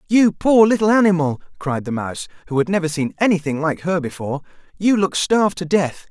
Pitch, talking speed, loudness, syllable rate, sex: 170 Hz, 195 wpm, -18 LUFS, 5.9 syllables/s, male